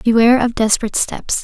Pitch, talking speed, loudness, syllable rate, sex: 230 Hz, 165 wpm, -15 LUFS, 6.8 syllables/s, female